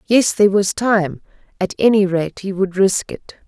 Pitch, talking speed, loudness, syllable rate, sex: 195 Hz, 190 wpm, -17 LUFS, 4.6 syllables/s, female